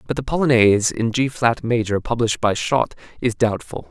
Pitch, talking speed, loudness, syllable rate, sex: 115 Hz, 185 wpm, -19 LUFS, 5.4 syllables/s, male